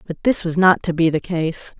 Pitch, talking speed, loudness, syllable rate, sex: 170 Hz, 270 wpm, -18 LUFS, 5.2 syllables/s, female